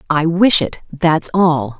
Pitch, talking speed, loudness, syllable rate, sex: 165 Hz, 165 wpm, -15 LUFS, 3.5 syllables/s, female